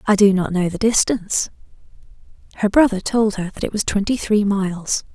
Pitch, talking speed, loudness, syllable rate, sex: 205 Hz, 185 wpm, -19 LUFS, 5.5 syllables/s, female